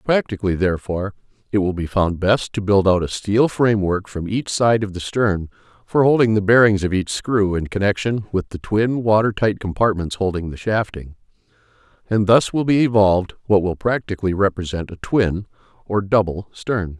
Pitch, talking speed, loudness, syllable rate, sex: 100 Hz, 180 wpm, -19 LUFS, 5.2 syllables/s, male